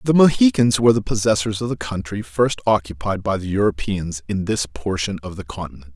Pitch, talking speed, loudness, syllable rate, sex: 100 Hz, 190 wpm, -20 LUFS, 5.6 syllables/s, male